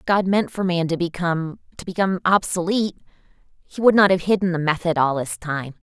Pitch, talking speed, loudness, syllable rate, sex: 175 Hz, 195 wpm, -20 LUFS, 5.9 syllables/s, female